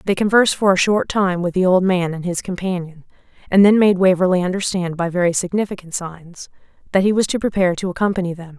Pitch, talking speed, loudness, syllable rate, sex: 185 Hz, 210 wpm, -18 LUFS, 6.2 syllables/s, female